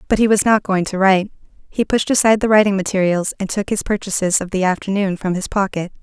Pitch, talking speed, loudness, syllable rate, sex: 195 Hz, 230 wpm, -17 LUFS, 6.3 syllables/s, female